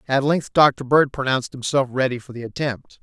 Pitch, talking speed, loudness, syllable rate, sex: 130 Hz, 200 wpm, -20 LUFS, 5.2 syllables/s, male